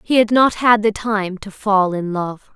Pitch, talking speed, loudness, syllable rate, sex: 210 Hz, 235 wpm, -17 LUFS, 4.1 syllables/s, female